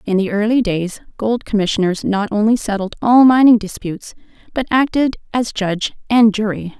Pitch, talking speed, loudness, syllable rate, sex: 215 Hz, 160 wpm, -16 LUFS, 5.2 syllables/s, female